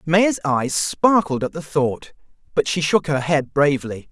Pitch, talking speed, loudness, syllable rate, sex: 155 Hz, 175 wpm, -20 LUFS, 4.3 syllables/s, male